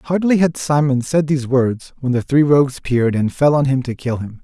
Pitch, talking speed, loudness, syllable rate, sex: 135 Hz, 245 wpm, -17 LUFS, 5.6 syllables/s, male